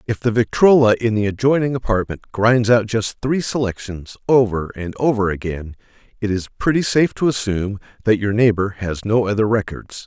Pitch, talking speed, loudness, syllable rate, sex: 110 Hz, 175 wpm, -18 LUFS, 5.2 syllables/s, male